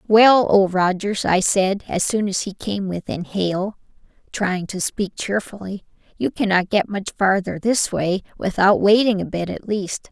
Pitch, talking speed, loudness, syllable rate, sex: 195 Hz, 165 wpm, -20 LUFS, 4.2 syllables/s, female